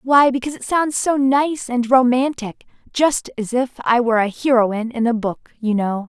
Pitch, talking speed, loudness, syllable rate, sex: 250 Hz, 195 wpm, -18 LUFS, 4.8 syllables/s, female